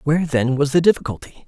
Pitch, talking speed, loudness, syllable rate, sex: 145 Hz, 205 wpm, -18 LUFS, 6.6 syllables/s, male